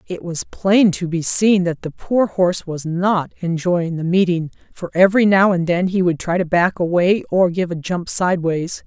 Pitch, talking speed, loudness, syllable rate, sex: 180 Hz, 210 wpm, -18 LUFS, 4.7 syllables/s, female